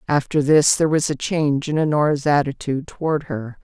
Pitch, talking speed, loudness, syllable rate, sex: 145 Hz, 180 wpm, -19 LUFS, 5.8 syllables/s, female